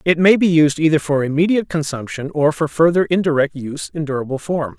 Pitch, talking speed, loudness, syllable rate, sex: 155 Hz, 200 wpm, -17 LUFS, 6.0 syllables/s, male